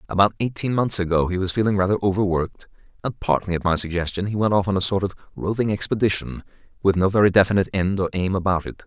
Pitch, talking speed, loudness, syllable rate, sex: 95 Hz, 215 wpm, -21 LUFS, 6.9 syllables/s, male